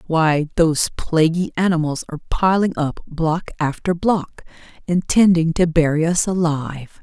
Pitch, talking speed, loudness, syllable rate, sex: 165 Hz, 130 wpm, -19 LUFS, 4.7 syllables/s, female